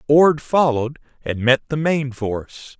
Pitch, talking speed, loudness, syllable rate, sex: 135 Hz, 150 wpm, -19 LUFS, 4.3 syllables/s, male